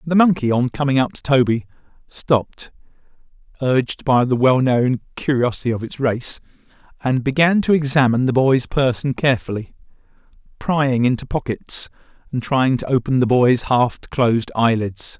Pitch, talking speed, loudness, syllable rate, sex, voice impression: 130 Hz, 140 wpm, -18 LUFS, 4.9 syllables/s, male, very masculine, very adult-like, middle-aged, slightly tensed, powerful, dark, hard, slightly muffled, slightly halting, very cool, very intellectual, very sincere, very calm, very mature, friendly, very reassuring, unique, elegant, very wild, sweet, slightly lively, very kind, slightly modest